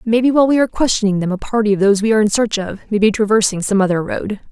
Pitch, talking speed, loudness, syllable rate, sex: 210 Hz, 280 wpm, -16 LUFS, 7.4 syllables/s, female